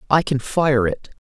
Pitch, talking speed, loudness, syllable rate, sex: 155 Hz, 195 wpm, -19 LUFS, 4.4 syllables/s, female